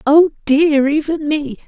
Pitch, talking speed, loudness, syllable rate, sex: 295 Hz, 145 wpm, -15 LUFS, 3.8 syllables/s, female